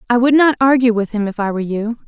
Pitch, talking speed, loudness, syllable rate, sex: 230 Hz, 290 wpm, -15 LUFS, 6.6 syllables/s, female